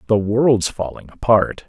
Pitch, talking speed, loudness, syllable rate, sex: 105 Hz, 145 wpm, -18 LUFS, 4.1 syllables/s, male